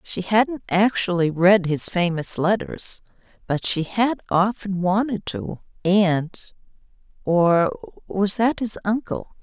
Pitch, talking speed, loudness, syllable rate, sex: 190 Hz, 115 wpm, -21 LUFS, 3.6 syllables/s, female